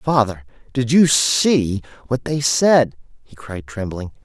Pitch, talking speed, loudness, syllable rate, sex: 125 Hz, 140 wpm, -18 LUFS, 3.6 syllables/s, male